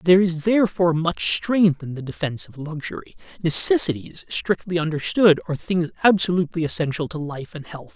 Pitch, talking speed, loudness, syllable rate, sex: 165 Hz, 160 wpm, -21 LUFS, 5.7 syllables/s, male